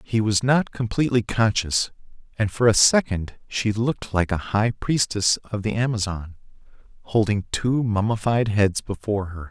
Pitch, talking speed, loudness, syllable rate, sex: 105 Hz, 145 wpm, -22 LUFS, 4.6 syllables/s, male